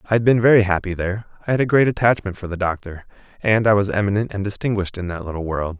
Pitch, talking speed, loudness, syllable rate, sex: 100 Hz, 250 wpm, -19 LUFS, 7.1 syllables/s, male